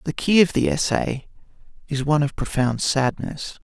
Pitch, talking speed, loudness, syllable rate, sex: 140 Hz, 165 wpm, -21 LUFS, 4.8 syllables/s, male